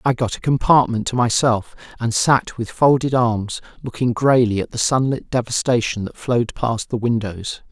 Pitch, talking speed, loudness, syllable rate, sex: 120 Hz, 170 wpm, -19 LUFS, 4.8 syllables/s, male